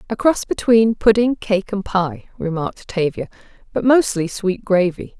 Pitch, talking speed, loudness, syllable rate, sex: 200 Hz, 150 wpm, -18 LUFS, 4.5 syllables/s, female